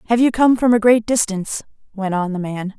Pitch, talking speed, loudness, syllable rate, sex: 215 Hz, 235 wpm, -17 LUFS, 5.8 syllables/s, female